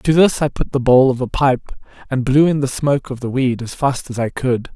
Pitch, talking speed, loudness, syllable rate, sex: 130 Hz, 280 wpm, -17 LUFS, 5.5 syllables/s, male